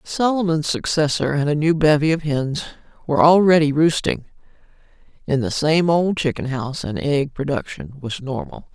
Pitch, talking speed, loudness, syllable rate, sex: 150 Hz, 150 wpm, -19 LUFS, 5.1 syllables/s, female